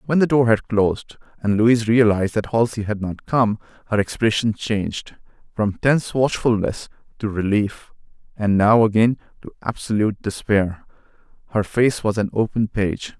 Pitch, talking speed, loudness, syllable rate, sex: 110 Hz, 150 wpm, -20 LUFS, 4.9 syllables/s, male